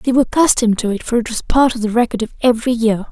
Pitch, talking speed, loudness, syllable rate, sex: 235 Hz, 290 wpm, -16 LUFS, 7.4 syllables/s, female